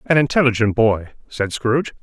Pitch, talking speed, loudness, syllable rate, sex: 120 Hz, 150 wpm, -18 LUFS, 5.5 syllables/s, male